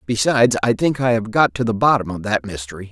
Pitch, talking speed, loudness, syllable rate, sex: 115 Hz, 245 wpm, -18 LUFS, 6.3 syllables/s, male